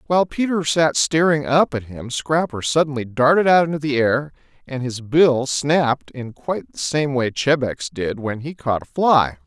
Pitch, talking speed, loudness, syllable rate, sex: 140 Hz, 190 wpm, -19 LUFS, 4.6 syllables/s, male